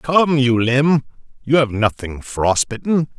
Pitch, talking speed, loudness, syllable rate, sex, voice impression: 130 Hz, 150 wpm, -17 LUFS, 3.7 syllables/s, male, very masculine, slightly young, slightly adult-like, slightly thick, relaxed, weak, slightly dark, soft, slightly muffled, slightly raspy, slightly cool, intellectual, slightly refreshing, very sincere, very calm, slightly mature, friendly, reassuring, unique, elegant, sweet, slightly lively, very kind, modest